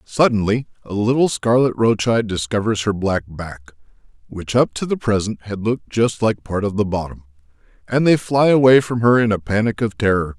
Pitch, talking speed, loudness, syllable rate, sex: 110 Hz, 195 wpm, -18 LUFS, 5.2 syllables/s, male